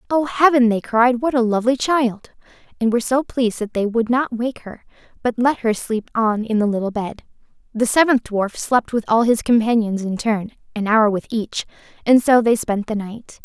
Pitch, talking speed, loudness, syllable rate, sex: 230 Hz, 210 wpm, -19 LUFS, 5.0 syllables/s, female